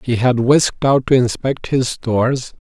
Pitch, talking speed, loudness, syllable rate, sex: 125 Hz, 180 wpm, -16 LUFS, 4.4 syllables/s, male